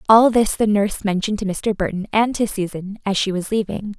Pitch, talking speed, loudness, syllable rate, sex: 205 Hz, 225 wpm, -20 LUFS, 5.7 syllables/s, female